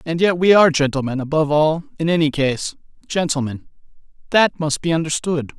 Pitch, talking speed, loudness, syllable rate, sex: 155 Hz, 160 wpm, -18 LUFS, 5.7 syllables/s, male